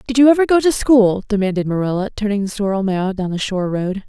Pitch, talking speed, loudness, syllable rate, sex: 210 Hz, 235 wpm, -17 LUFS, 6.3 syllables/s, female